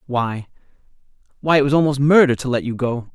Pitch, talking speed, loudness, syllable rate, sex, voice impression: 135 Hz, 155 wpm, -18 LUFS, 5.9 syllables/s, male, masculine, adult-like, tensed, powerful, bright, clear, slightly halting, cool, friendly, wild, lively, intense, slightly sharp, slightly light